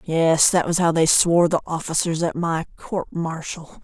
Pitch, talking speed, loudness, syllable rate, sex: 165 Hz, 190 wpm, -20 LUFS, 4.6 syllables/s, female